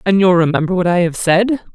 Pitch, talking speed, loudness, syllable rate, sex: 185 Hz, 240 wpm, -14 LUFS, 5.7 syllables/s, female